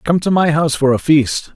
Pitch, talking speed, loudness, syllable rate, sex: 155 Hz, 270 wpm, -14 LUFS, 5.5 syllables/s, male